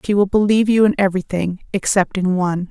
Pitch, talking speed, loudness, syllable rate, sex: 195 Hz, 200 wpm, -17 LUFS, 6.6 syllables/s, female